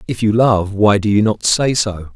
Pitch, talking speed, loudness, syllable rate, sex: 105 Hz, 250 wpm, -15 LUFS, 4.6 syllables/s, male